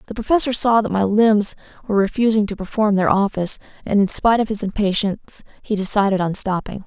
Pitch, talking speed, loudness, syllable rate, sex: 205 Hz, 190 wpm, -18 LUFS, 6.2 syllables/s, female